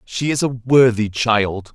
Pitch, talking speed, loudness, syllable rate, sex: 115 Hz, 170 wpm, -17 LUFS, 3.7 syllables/s, male